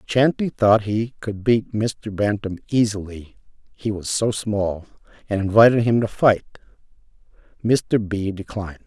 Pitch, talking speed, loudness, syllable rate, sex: 105 Hz, 135 wpm, -21 LUFS, 4.3 syllables/s, male